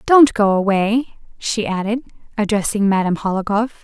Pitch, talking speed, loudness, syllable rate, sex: 215 Hz, 125 wpm, -18 LUFS, 5.0 syllables/s, female